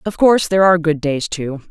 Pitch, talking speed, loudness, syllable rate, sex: 170 Hz, 245 wpm, -15 LUFS, 6.5 syllables/s, female